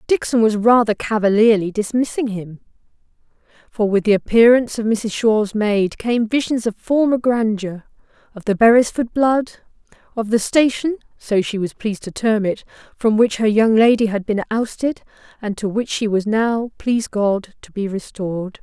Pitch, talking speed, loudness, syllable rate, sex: 220 Hz, 165 wpm, -18 LUFS, 4.5 syllables/s, female